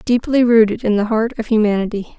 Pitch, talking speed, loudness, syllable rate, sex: 225 Hz, 190 wpm, -16 LUFS, 5.7 syllables/s, female